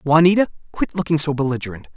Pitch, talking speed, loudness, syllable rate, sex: 150 Hz, 155 wpm, -19 LUFS, 7.6 syllables/s, male